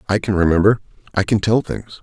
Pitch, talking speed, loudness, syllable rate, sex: 100 Hz, 205 wpm, -18 LUFS, 6.1 syllables/s, male